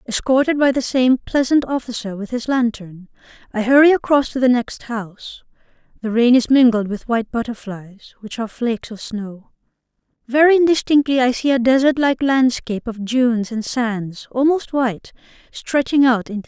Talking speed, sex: 170 wpm, female